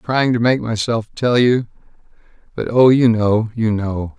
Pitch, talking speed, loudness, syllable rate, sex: 115 Hz, 160 wpm, -16 LUFS, 4.3 syllables/s, male